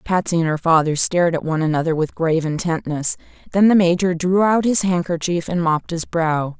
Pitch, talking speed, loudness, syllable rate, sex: 170 Hz, 200 wpm, -18 LUFS, 5.7 syllables/s, female